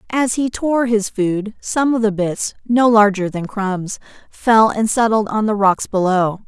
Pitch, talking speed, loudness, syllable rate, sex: 215 Hz, 185 wpm, -17 LUFS, 4.0 syllables/s, female